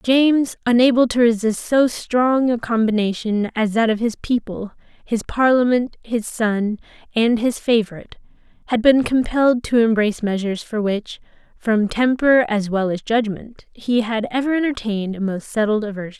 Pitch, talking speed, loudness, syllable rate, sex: 230 Hz, 155 wpm, -19 LUFS, 4.9 syllables/s, female